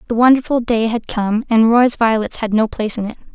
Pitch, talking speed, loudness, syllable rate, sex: 225 Hz, 235 wpm, -16 LUFS, 5.7 syllables/s, female